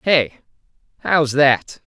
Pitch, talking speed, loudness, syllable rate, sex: 135 Hz, 90 wpm, -17 LUFS, 2.7 syllables/s, male